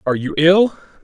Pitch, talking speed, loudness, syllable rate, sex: 165 Hz, 175 wpm, -15 LUFS, 6.0 syllables/s, male